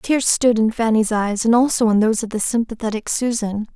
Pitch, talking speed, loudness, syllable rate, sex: 225 Hz, 210 wpm, -18 LUFS, 5.5 syllables/s, female